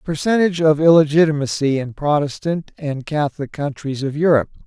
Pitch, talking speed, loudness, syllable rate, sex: 150 Hz, 130 wpm, -18 LUFS, 5.7 syllables/s, male